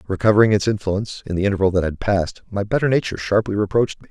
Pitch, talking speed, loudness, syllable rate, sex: 100 Hz, 220 wpm, -19 LUFS, 7.6 syllables/s, male